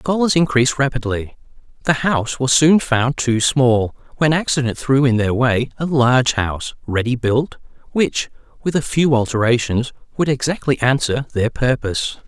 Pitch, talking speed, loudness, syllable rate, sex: 130 Hz, 155 wpm, -18 LUFS, 5.0 syllables/s, male